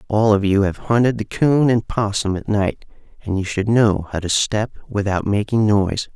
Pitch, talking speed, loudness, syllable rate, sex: 105 Hz, 205 wpm, -19 LUFS, 4.8 syllables/s, male